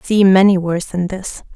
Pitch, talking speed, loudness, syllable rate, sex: 185 Hz, 195 wpm, -14 LUFS, 5.1 syllables/s, female